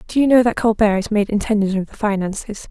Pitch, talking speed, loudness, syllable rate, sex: 210 Hz, 245 wpm, -18 LUFS, 6.3 syllables/s, female